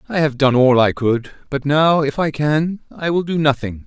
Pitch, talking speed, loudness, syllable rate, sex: 145 Hz, 235 wpm, -17 LUFS, 4.6 syllables/s, male